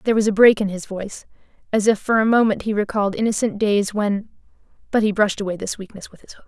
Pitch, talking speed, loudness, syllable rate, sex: 210 Hz, 230 wpm, -19 LUFS, 6.8 syllables/s, female